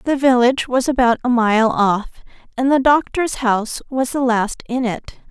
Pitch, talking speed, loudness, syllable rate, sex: 245 Hz, 180 wpm, -17 LUFS, 4.7 syllables/s, female